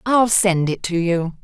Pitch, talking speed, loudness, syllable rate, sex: 185 Hz, 210 wpm, -18 LUFS, 3.9 syllables/s, female